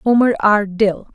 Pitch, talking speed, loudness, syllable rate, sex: 210 Hz, 155 wpm, -15 LUFS, 4.1 syllables/s, female